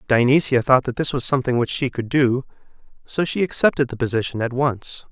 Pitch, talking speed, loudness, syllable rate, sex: 130 Hz, 200 wpm, -20 LUFS, 5.8 syllables/s, male